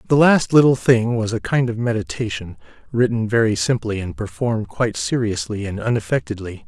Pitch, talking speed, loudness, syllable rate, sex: 110 Hz, 160 wpm, -19 LUFS, 5.5 syllables/s, male